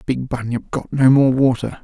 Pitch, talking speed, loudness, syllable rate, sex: 130 Hz, 195 wpm, -17 LUFS, 5.0 syllables/s, male